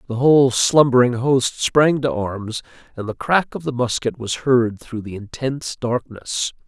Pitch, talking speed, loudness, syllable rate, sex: 125 Hz, 170 wpm, -19 LUFS, 4.3 syllables/s, male